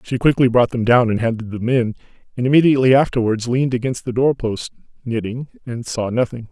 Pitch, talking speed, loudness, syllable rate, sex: 120 Hz, 185 wpm, -18 LUFS, 6.0 syllables/s, male